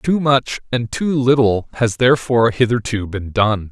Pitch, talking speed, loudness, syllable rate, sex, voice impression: 120 Hz, 160 wpm, -17 LUFS, 4.6 syllables/s, male, very masculine, adult-like, slightly middle-aged, very thick, very tensed, powerful, bright, hard, slightly muffled, fluent, very cool, intellectual, slightly refreshing, sincere, reassuring, unique, wild, slightly sweet, lively